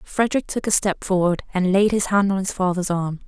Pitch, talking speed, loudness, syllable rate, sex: 190 Hz, 240 wpm, -21 LUFS, 5.6 syllables/s, female